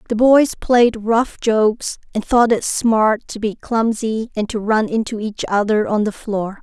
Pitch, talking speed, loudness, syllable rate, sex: 220 Hz, 190 wpm, -17 LUFS, 4.1 syllables/s, female